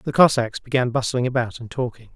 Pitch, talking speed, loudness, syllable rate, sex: 125 Hz, 195 wpm, -21 LUFS, 5.7 syllables/s, male